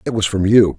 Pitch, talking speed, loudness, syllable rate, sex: 105 Hz, 305 wpm, -15 LUFS, 6.0 syllables/s, male